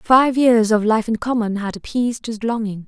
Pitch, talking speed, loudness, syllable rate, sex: 225 Hz, 210 wpm, -18 LUFS, 5.0 syllables/s, female